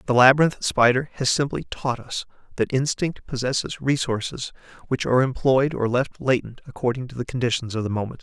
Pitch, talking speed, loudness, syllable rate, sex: 125 Hz, 175 wpm, -23 LUFS, 5.6 syllables/s, male